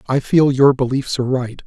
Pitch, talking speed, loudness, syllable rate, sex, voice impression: 130 Hz, 215 wpm, -16 LUFS, 5.4 syllables/s, male, masculine, middle-aged, slightly muffled, slightly fluent, slightly calm, friendly, slightly reassuring, slightly kind